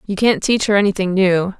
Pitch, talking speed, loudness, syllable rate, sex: 195 Hz, 225 wpm, -16 LUFS, 5.5 syllables/s, female